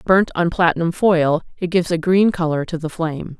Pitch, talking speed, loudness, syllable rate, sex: 170 Hz, 210 wpm, -18 LUFS, 5.5 syllables/s, female